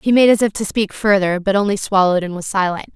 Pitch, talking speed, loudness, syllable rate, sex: 200 Hz, 265 wpm, -16 LUFS, 6.5 syllables/s, female